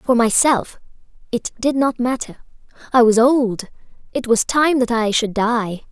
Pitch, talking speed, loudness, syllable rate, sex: 240 Hz, 160 wpm, -17 LUFS, 4.1 syllables/s, female